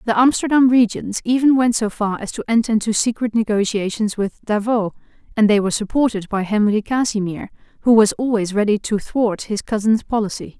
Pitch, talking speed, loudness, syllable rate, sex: 220 Hz, 175 wpm, -18 LUFS, 5.5 syllables/s, female